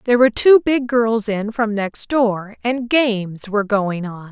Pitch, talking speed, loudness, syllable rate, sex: 225 Hz, 195 wpm, -18 LUFS, 4.4 syllables/s, female